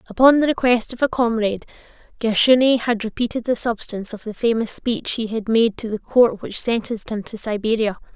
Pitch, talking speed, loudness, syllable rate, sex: 225 Hz, 190 wpm, -20 LUFS, 5.6 syllables/s, female